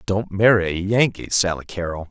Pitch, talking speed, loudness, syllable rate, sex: 100 Hz, 170 wpm, -20 LUFS, 5.0 syllables/s, male